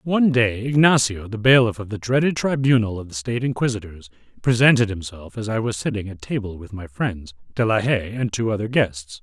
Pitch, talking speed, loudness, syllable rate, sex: 110 Hz, 200 wpm, -21 LUFS, 5.6 syllables/s, male